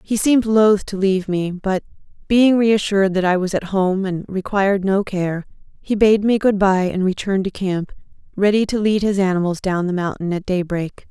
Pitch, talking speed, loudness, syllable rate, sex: 195 Hz, 200 wpm, -18 LUFS, 5.1 syllables/s, female